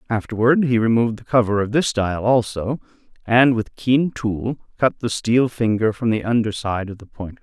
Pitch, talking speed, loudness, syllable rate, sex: 115 Hz, 195 wpm, -19 LUFS, 5.0 syllables/s, male